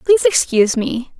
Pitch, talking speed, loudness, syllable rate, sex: 280 Hz, 150 wpm, -15 LUFS, 5.8 syllables/s, female